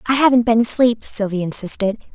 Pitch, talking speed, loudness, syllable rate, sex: 225 Hz, 170 wpm, -17 LUFS, 5.7 syllables/s, female